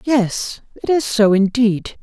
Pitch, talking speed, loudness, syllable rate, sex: 225 Hz, 150 wpm, -17 LUFS, 3.6 syllables/s, female